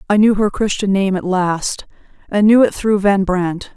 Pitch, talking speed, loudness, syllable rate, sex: 200 Hz, 205 wpm, -15 LUFS, 4.5 syllables/s, female